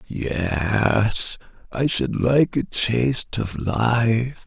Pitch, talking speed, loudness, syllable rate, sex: 110 Hz, 105 wpm, -21 LUFS, 2.3 syllables/s, male